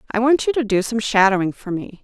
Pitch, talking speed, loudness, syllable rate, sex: 220 Hz, 265 wpm, -18 LUFS, 6.1 syllables/s, female